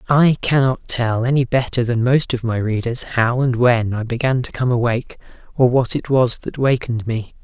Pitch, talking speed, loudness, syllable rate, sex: 125 Hz, 200 wpm, -18 LUFS, 5.0 syllables/s, male